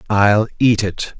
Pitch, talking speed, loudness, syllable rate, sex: 105 Hz, 150 wpm, -16 LUFS, 3.5 syllables/s, male